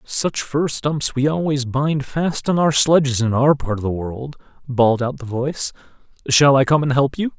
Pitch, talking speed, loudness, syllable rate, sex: 140 Hz, 210 wpm, -18 LUFS, 4.7 syllables/s, male